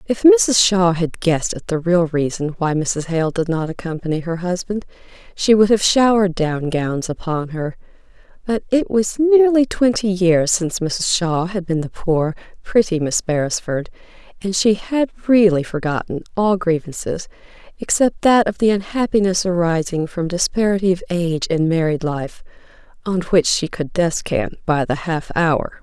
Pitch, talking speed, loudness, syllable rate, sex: 180 Hz, 165 wpm, -18 LUFS, 4.6 syllables/s, female